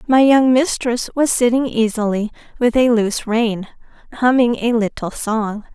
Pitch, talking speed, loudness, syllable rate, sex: 235 Hz, 145 wpm, -17 LUFS, 4.5 syllables/s, female